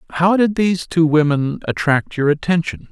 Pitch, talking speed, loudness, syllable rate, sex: 165 Hz, 165 wpm, -17 LUFS, 5.2 syllables/s, male